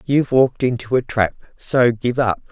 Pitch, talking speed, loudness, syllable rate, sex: 125 Hz, 190 wpm, -18 LUFS, 5.2 syllables/s, female